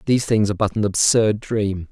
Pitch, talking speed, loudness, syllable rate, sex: 105 Hz, 220 wpm, -19 LUFS, 5.7 syllables/s, male